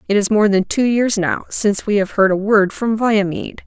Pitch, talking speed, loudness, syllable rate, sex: 205 Hz, 245 wpm, -16 LUFS, 5.2 syllables/s, female